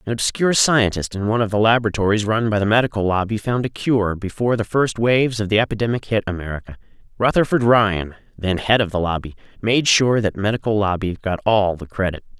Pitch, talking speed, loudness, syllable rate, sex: 105 Hz, 200 wpm, -19 LUFS, 6.1 syllables/s, male